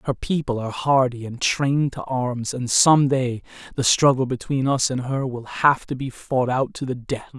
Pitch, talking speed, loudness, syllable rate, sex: 130 Hz, 210 wpm, -21 LUFS, 4.7 syllables/s, male